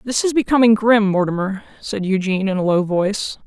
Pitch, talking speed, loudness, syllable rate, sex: 205 Hz, 190 wpm, -18 LUFS, 5.7 syllables/s, female